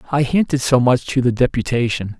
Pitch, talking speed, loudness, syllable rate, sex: 125 Hz, 190 wpm, -17 LUFS, 5.5 syllables/s, male